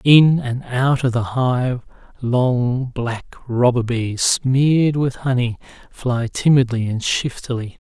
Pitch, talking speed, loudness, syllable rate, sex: 125 Hz, 130 wpm, -19 LUFS, 3.5 syllables/s, male